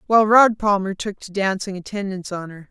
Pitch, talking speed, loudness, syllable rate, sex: 195 Hz, 200 wpm, -20 LUFS, 5.5 syllables/s, female